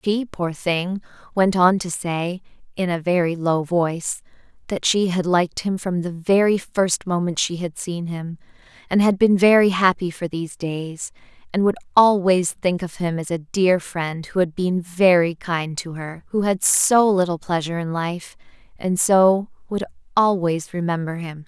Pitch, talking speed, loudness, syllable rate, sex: 180 Hz, 180 wpm, -20 LUFS, 4.4 syllables/s, female